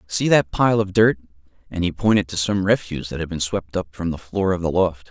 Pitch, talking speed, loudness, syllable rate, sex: 90 Hz, 260 wpm, -20 LUFS, 5.7 syllables/s, male